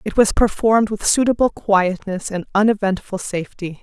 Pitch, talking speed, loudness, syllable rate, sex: 200 Hz, 140 wpm, -18 LUFS, 5.2 syllables/s, female